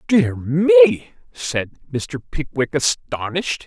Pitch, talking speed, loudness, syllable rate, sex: 150 Hz, 100 wpm, -19 LUFS, 3.7 syllables/s, male